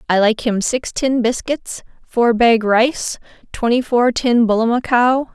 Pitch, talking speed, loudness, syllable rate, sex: 235 Hz, 145 wpm, -16 LUFS, 3.9 syllables/s, female